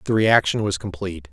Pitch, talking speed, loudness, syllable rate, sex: 95 Hz, 180 wpm, -20 LUFS, 6.1 syllables/s, male